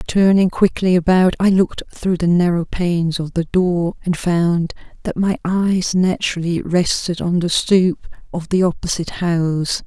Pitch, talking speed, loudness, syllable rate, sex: 175 Hz, 160 wpm, -17 LUFS, 4.5 syllables/s, female